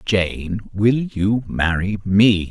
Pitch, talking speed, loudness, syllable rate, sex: 100 Hz, 120 wpm, -19 LUFS, 2.6 syllables/s, male